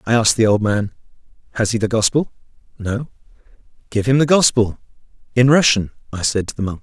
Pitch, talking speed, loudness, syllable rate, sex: 115 Hz, 185 wpm, -17 LUFS, 6.1 syllables/s, male